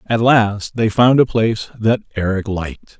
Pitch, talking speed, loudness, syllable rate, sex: 110 Hz, 180 wpm, -16 LUFS, 4.5 syllables/s, male